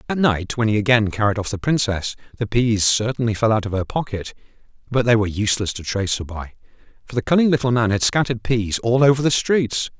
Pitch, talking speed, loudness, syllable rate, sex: 115 Hz, 220 wpm, -20 LUFS, 6.2 syllables/s, male